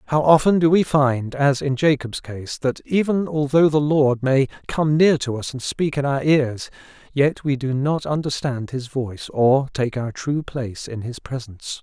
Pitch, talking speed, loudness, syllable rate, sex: 140 Hz, 200 wpm, -20 LUFS, 4.5 syllables/s, male